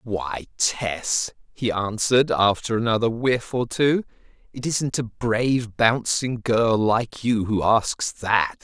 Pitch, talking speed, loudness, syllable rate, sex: 115 Hz, 140 wpm, -22 LUFS, 3.5 syllables/s, male